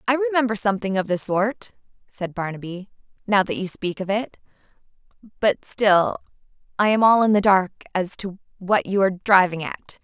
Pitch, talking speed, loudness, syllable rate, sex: 200 Hz, 175 wpm, -21 LUFS, 5.2 syllables/s, female